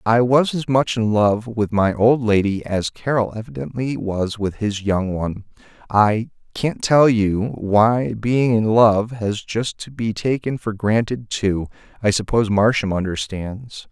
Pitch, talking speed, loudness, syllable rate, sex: 110 Hz, 155 wpm, -19 LUFS, 4.0 syllables/s, male